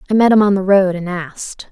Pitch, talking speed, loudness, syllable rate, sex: 190 Hz, 280 wpm, -14 LUFS, 6.0 syllables/s, female